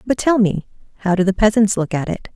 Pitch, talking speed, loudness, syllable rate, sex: 200 Hz, 255 wpm, -17 LUFS, 6.0 syllables/s, female